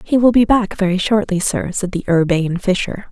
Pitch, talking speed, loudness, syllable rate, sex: 200 Hz, 210 wpm, -16 LUFS, 5.5 syllables/s, female